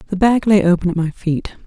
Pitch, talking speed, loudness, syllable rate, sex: 185 Hz, 250 wpm, -16 LUFS, 5.8 syllables/s, female